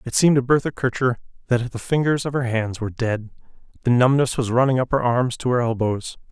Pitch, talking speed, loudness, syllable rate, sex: 125 Hz, 220 wpm, -21 LUFS, 5.9 syllables/s, male